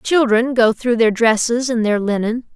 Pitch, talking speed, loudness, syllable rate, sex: 230 Hz, 190 wpm, -16 LUFS, 4.5 syllables/s, female